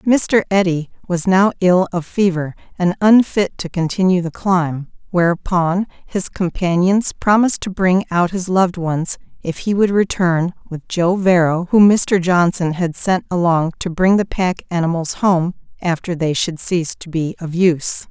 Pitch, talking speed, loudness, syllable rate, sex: 180 Hz, 165 wpm, -17 LUFS, 4.4 syllables/s, female